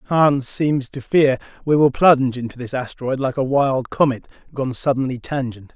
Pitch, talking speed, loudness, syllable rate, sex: 135 Hz, 175 wpm, -19 LUFS, 4.8 syllables/s, male